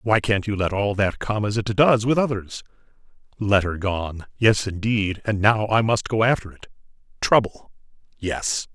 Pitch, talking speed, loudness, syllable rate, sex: 105 Hz, 160 wpm, -21 LUFS, 4.5 syllables/s, male